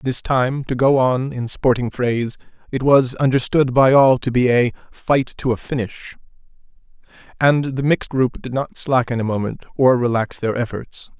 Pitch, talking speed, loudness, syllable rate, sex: 125 Hz, 175 wpm, -18 LUFS, 4.7 syllables/s, male